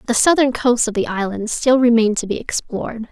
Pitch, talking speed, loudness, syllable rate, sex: 230 Hz, 210 wpm, -17 LUFS, 5.8 syllables/s, female